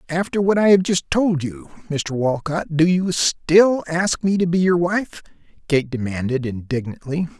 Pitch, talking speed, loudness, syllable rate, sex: 165 Hz, 170 wpm, -19 LUFS, 4.3 syllables/s, male